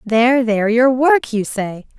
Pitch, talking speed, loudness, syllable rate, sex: 235 Hz, 180 wpm, -15 LUFS, 4.7 syllables/s, female